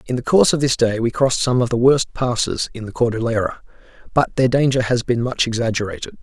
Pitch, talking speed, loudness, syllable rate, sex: 120 Hz, 220 wpm, -18 LUFS, 6.2 syllables/s, male